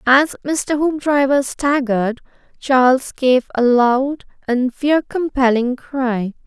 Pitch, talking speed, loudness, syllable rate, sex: 265 Hz, 110 wpm, -17 LUFS, 3.5 syllables/s, female